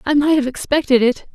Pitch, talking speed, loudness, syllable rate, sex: 275 Hz, 225 wpm, -16 LUFS, 5.9 syllables/s, female